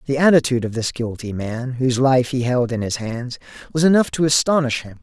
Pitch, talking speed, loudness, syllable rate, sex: 130 Hz, 215 wpm, -19 LUFS, 5.7 syllables/s, male